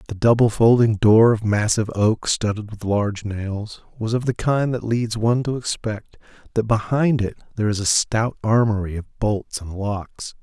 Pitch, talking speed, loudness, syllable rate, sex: 110 Hz, 185 wpm, -20 LUFS, 4.8 syllables/s, male